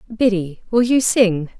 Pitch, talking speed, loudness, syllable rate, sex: 210 Hz, 150 wpm, -17 LUFS, 4.0 syllables/s, female